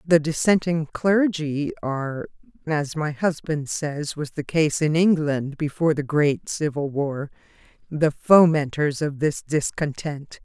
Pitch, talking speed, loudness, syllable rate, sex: 155 Hz, 130 wpm, -22 LUFS, 3.9 syllables/s, female